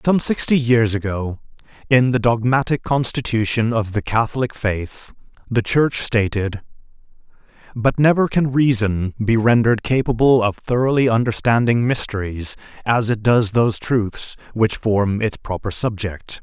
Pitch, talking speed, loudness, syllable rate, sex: 115 Hz, 130 wpm, -18 LUFS, 4.5 syllables/s, male